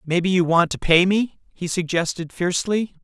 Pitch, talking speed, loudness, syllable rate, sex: 180 Hz, 180 wpm, -20 LUFS, 5.1 syllables/s, male